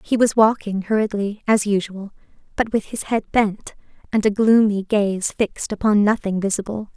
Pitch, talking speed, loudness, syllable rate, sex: 210 Hz, 165 wpm, -20 LUFS, 4.8 syllables/s, female